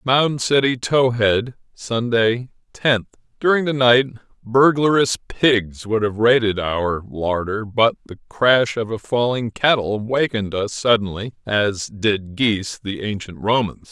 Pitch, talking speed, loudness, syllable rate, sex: 115 Hz, 130 wpm, -19 LUFS, 4.0 syllables/s, male